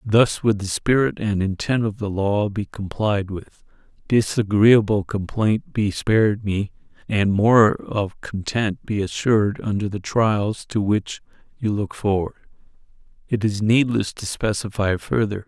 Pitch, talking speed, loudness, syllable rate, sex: 105 Hz, 145 wpm, -21 LUFS, 4.1 syllables/s, male